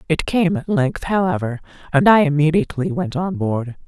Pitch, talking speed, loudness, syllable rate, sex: 165 Hz, 170 wpm, -18 LUFS, 5.2 syllables/s, female